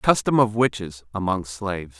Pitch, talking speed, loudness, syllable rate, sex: 100 Hz, 150 wpm, -23 LUFS, 4.8 syllables/s, male